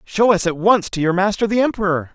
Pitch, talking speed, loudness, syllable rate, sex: 195 Hz, 250 wpm, -17 LUFS, 5.9 syllables/s, male